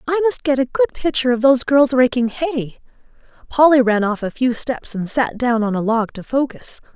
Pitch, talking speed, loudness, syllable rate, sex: 255 Hz, 215 wpm, -17 LUFS, 5.5 syllables/s, female